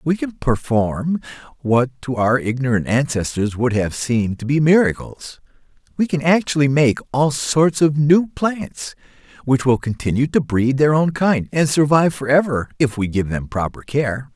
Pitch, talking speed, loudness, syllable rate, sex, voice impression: 135 Hz, 165 wpm, -18 LUFS, 4.5 syllables/s, male, very masculine, middle-aged, very thick, very tensed, powerful, bright, very soft, clear, fluent, slightly raspy, very cool, intellectual, refreshing, sincere, very calm, very friendly, very reassuring, very unique, very elegant, wild, very sweet, very lively, kind, slightly intense